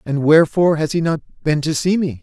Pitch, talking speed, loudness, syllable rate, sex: 160 Hz, 245 wpm, -17 LUFS, 6.4 syllables/s, male